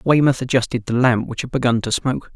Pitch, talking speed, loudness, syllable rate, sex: 125 Hz, 230 wpm, -19 LUFS, 6.3 syllables/s, male